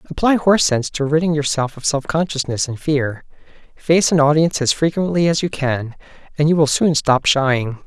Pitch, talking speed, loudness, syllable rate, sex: 150 Hz, 190 wpm, -17 LUFS, 5.3 syllables/s, male